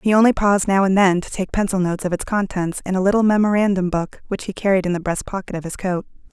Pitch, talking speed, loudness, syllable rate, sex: 190 Hz, 265 wpm, -19 LUFS, 6.6 syllables/s, female